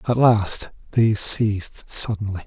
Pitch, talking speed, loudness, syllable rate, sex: 105 Hz, 120 wpm, -20 LUFS, 4.5 syllables/s, male